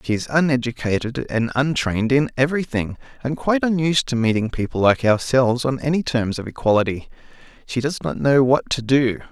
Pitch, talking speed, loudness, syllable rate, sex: 130 Hz, 175 wpm, -20 LUFS, 5.9 syllables/s, male